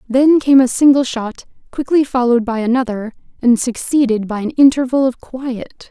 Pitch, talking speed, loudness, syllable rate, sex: 250 Hz, 160 wpm, -15 LUFS, 5.1 syllables/s, female